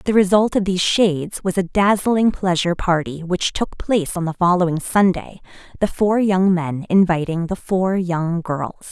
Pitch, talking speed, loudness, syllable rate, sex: 180 Hz, 175 wpm, -19 LUFS, 4.7 syllables/s, female